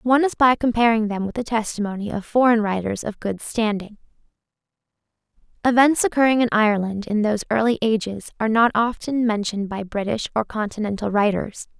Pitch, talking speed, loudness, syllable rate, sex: 220 Hz, 160 wpm, -21 LUFS, 5.9 syllables/s, female